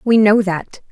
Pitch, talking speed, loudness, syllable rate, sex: 205 Hz, 195 wpm, -15 LUFS, 4.0 syllables/s, female